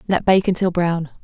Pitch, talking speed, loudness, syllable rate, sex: 180 Hz, 195 wpm, -18 LUFS, 5.2 syllables/s, female